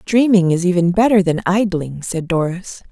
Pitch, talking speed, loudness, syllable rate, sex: 185 Hz, 165 wpm, -16 LUFS, 4.8 syllables/s, female